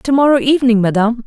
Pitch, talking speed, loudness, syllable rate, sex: 245 Hz, 190 wpm, -13 LUFS, 6.6 syllables/s, female